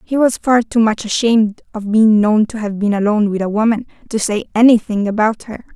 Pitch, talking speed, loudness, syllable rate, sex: 220 Hz, 220 wpm, -15 LUFS, 5.6 syllables/s, female